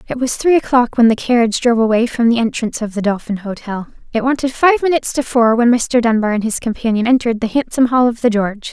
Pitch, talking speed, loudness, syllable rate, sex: 235 Hz, 240 wpm, -15 LUFS, 6.6 syllables/s, female